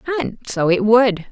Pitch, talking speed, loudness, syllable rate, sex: 225 Hz, 185 wpm, -17 LUFS, 4.8 syllables/s, female